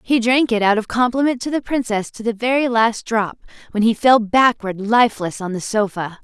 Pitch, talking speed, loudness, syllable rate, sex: 225 Hz, 210 wpm, -18 LUFS, 5.2 syllables/s, female